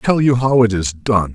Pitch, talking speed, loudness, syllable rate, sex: 115 Hz, 265 wpm, -15 LUFS, 4.6 syllables/s, male